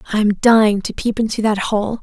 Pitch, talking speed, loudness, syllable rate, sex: 215 Hz, 235 wpm, -16 LUFS, 5.7 syllables/s, female